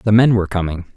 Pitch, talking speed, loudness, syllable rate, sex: 100 Hz, 250 wpm, -16 LUFS, 7.0 syllables/s, male